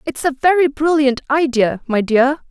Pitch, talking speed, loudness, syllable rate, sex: 275 Hz, 170 wpm, -16 LUFS, 4.6 syllables/s, female